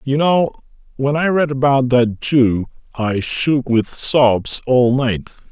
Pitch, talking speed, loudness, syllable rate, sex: 130 Hz, 150 wpm, -16 LUFS, 3.4 syllables/s, male